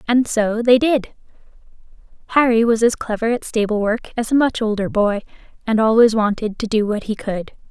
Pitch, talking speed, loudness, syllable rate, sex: 225 Hz, 185 wpm, -18 LUFS, 5.3 syllables/s, female